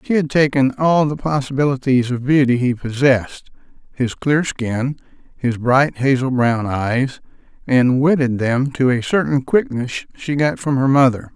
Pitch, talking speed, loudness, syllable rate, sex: 135 Hz, 160 wpm, -17 LUFS, 4.5 syllables/s, male